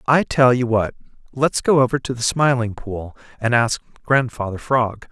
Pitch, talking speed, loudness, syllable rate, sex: 120 Hz, 175 wpm, -19 LUFS, 4.6 syllables/s, male